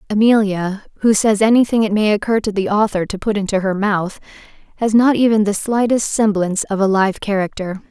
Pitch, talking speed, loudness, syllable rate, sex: 210 Hz, 190 wpm, -16 LUFS, 5.6 syllables/s, female